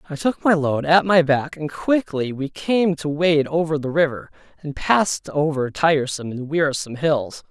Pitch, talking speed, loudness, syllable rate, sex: 155 Hz, 185 wpm, -20 LUFS, 4.9 syllables/s, male